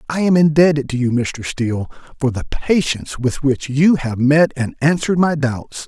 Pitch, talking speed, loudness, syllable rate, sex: 140 Hz, 195 wpm, -17 LUFS, 4.9 syllables/s, male